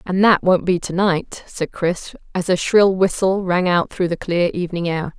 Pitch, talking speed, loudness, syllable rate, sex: 180 Hz, 220 wpm, -18 LUFS, 4.6 syllables/s, female